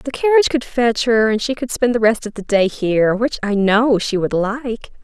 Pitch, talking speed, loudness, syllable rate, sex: 230 Hz, 250 wpm, -17 LUFS, 5.1 syllables/s, female